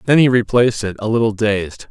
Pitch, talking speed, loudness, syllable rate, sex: 110 Hz, 220 wpm, -16 LUFS, 5.7 syllables/s, male